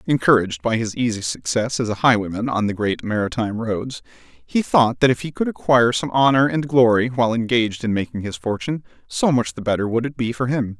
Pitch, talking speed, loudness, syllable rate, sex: 120 Hz, 215 wpm, -20 LUFS, 5.9 syllables/s, male